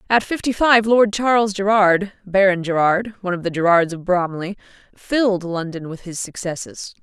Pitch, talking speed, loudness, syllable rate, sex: 195 Hz, 160 wpm, -18 LUFS, 5.0 syllables/s, female